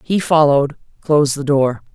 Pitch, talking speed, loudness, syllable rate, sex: 145 Hz, 155 wpm, -16 LUFS, 5.3 syllables/s, female